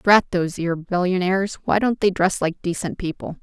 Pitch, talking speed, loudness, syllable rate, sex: 185 Hz, 195 wpm, -21 LUFS, 5.3 syllables/s, female